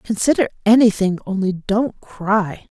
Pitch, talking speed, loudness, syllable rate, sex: 205 Hz, 105 wpm, -18 LUFS, 4.2 syllables/s, female